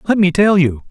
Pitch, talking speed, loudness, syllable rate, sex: 175 Hz, 265 wpm, -13 LUFS, 5.7 syllables/s, male